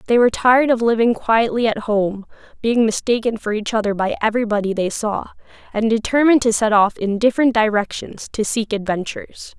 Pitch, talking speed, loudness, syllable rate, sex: 225 Hz, 175 wpm, -18 LUFS, 5.7 syllables/s, female